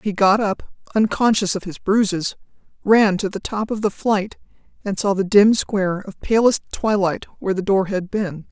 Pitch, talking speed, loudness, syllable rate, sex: 200 Hz, 190 wpm, -19 LUFS, 4.8 syllables/s, female